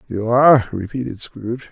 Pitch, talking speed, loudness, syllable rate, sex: 120 Hz, 140 wpm, -17 LUFS, 5.5 syllables/s, male